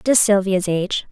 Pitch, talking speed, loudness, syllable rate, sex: 200 Hz, 160 wpm, -17 LUFS, 5.3 syllables/s, female